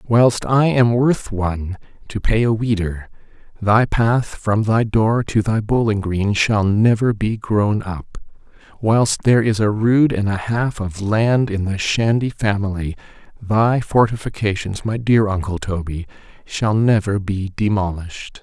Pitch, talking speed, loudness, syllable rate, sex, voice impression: 105 Hz, 145 wpm, -18 LUFS, 4.0 syllables/s, male, masculine, adult-like, tensed, hard, cool, intellectual, refreshing, sincere, calm, slightly friendly, slightly wild, slightly kind